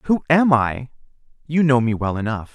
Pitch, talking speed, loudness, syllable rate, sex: 130 Hz, 190 wpm, -19 LUFS, 4.7 syllables/s, male